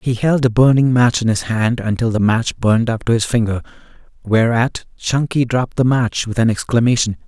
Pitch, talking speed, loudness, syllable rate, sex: 115 Hz, 200 wpm, -16 LUFS, 5.3 syllables/s, male